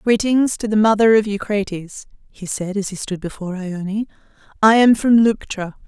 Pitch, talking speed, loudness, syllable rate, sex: 205 Hz, 175 wpm, -18 LUFS, 4.8 syllables/s, female